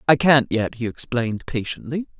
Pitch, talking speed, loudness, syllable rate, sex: 125 Hz, 165 wpm, -21 LUFS, 5.2 syllables/s, female